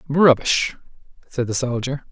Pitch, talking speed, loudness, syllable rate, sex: 135 Hz, 115 wpm, -20 LUFS, 4.3 syllables/s, male